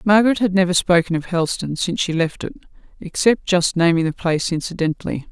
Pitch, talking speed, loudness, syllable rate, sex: 175 Hz, 180 wpm, -19 LUFS, 6.3 syllables/s, female